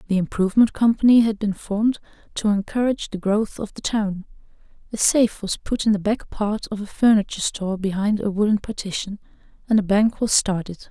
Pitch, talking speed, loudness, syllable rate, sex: 210 Hz, 185 wpm, -21 LUFS, 5.7 syllables/s, female